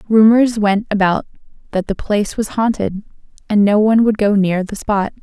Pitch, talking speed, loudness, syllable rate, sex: 210 Hz, 185 wpm, -15 LUFS, 5.2 syllables/s, female